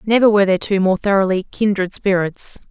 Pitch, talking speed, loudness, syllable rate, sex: 195 Hz, 180 wpm, -17 LUFS, 6.1 syllables/s, female